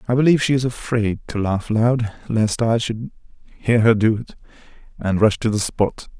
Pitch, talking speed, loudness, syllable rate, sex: 115 Hz, 195 wpm, -20 LUFS, 4.9 syllables/s, male